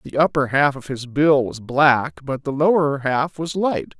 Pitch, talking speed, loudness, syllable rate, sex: 140 Hz, 210 wpm, -19 LUFS, 4.3 syllables/s, male